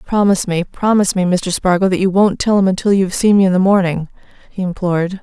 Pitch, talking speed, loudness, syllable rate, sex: 190 Hz, 230 wpm, -15 LUFS, 6.4 syllables/s, female